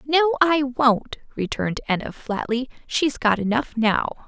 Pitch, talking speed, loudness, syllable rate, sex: 255 Hz, 140 wpm, -22 LUFS, 4.5 syllables/s, female